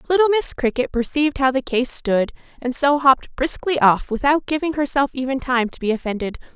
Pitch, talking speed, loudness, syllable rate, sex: 270 Hz, 190 wpm, -20 LUFS, 5.6 syllables/s, female